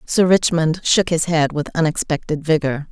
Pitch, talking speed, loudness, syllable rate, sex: 160 Hz, 165 wpm, -18 LUFS, 4.7 syllables/s, female